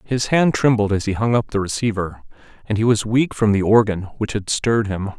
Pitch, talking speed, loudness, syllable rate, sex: 105 Hz, 230 wpm, -19 LUFS, 5.3 syllables/s, male